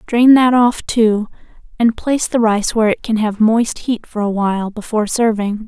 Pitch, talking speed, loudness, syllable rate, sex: 225 Hz, 200 wpm, -15 LUFS, 5.0 syllables/s, female